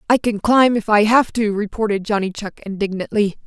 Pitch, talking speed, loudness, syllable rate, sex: 210 Hz, 190 wpm, -18 LUFS, 5.3 syllables/s, female